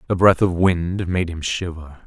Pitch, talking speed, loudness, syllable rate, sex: 90 Hz, 205 wpm, -20 LUFS, 4.3 syllables/s, male